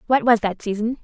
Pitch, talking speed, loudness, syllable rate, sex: 225 Hz, 230 wpm, -20 LUFS, 6.0 syllables/s, female